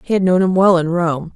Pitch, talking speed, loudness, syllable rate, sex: 175 Hz, 310 wpm, -15 LUFS, 5.6 syllables/s, female